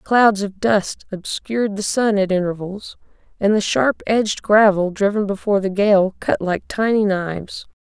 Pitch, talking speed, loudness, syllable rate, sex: 200 Hz, 160 wpm, -18 LUFS, 4.5 syllables/s, female